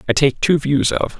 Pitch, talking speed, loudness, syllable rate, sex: 135 Hz, 250 wpm, -17 LUFS, 5.1 syllables/s, male